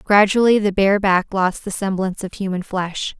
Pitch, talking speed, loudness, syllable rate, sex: 195 Hz, 190 wpm, -18 LUFS, 4.9 syllables/s, female